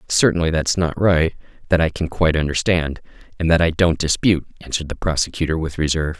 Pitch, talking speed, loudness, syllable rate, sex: 80 Hz, 185 wpm, -19 LUFS, 6.4 syllables/s, male